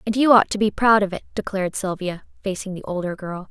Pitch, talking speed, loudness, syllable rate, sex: 195 Hz, 240 wpm, -21 LUFS, 6.2 syllables/s, female